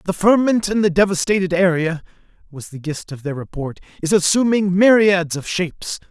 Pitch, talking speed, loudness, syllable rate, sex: 180 Hz, 165 wpm, -17 LUFS, 5.0 syllables/s, male